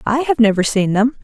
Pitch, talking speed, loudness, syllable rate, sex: 235 Hz, 245 wpm, -15 LUFS, 5.5 syllables/s, female